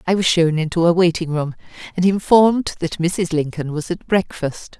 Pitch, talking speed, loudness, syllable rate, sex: 170 Hz, 190 wpm, -18 LUFS, 4.9 syllables/s, female